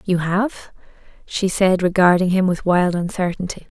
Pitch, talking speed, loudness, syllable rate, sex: 185 Hz, 140 wpm, -18 LUFS, 4.6 syllables/s, female